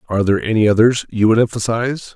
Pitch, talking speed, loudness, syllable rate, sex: 110 Hz, 195 wpm, -16 LUFS, 7.0 syllables/s, male